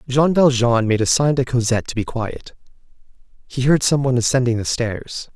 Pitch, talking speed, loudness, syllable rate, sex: 125 Hz, 190 wpm, -18 LUFS, 5.4 syllables/s, male